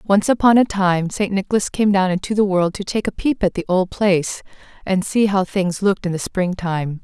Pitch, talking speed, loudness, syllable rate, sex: 190 Hz, 240 wpm, -18 LUFS, 5.3 syllables/s, female